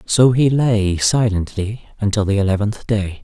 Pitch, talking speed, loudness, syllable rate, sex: 105 Hz, 150 wpm, -17 LUFS, 4.4 syllables/s, male